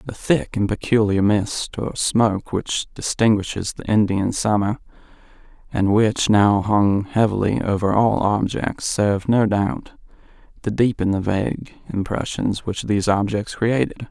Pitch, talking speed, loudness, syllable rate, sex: 105 Hz, 135 wpm, -20 LUFS, 4.3 syllables/s, male